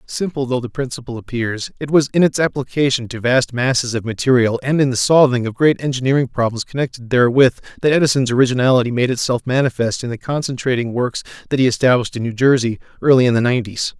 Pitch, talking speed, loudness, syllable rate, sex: 125 Hz, 195 wpm, -17 LUFS, 6.5 syllables/s, male